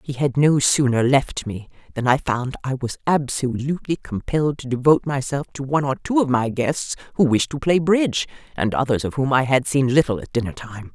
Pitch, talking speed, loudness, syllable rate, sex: 135 Hz, 215 wpm, -20 LUFS, 5.5 syllables/s, female